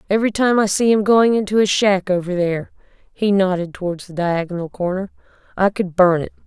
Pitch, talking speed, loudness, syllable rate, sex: 190 Hz, 195 wpm, -18 LUFS, 5.7 syllables/s, female